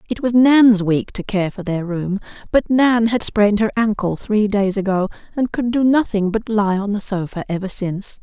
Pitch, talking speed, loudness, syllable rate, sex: 210 Hz, 210 wpm, -18 LUFS, 4.9 syllables/s, female